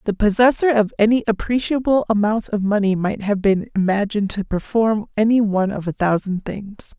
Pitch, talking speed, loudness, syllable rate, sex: 210 Hz, 170 wpm, -19 LUFS, 5.3 syllables/s, female